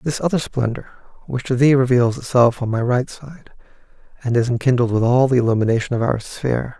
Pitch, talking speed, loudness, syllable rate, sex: 125 Hz, 195 wpm, -18 LUFS, 5.9 syllables/s, male